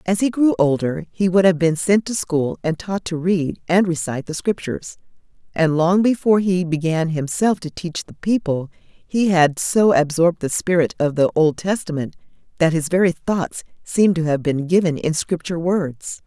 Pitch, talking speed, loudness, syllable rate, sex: 170 Hz, 190 wpm, -19 LUFS, 4.8 syllables/s, female